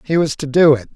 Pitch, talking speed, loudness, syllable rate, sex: 145 Hz, 315 wpm, -15 LUFS, 6.2 syllables/s, male